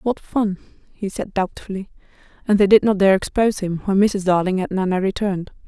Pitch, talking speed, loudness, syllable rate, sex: 195 Hz, 190 wpm, -19 LUFS, 5.7 syllables/s, female